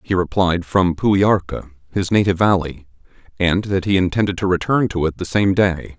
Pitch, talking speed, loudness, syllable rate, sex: 95 Hz, 180 wpm, -18 LUFS, 5.0 syllables/s, male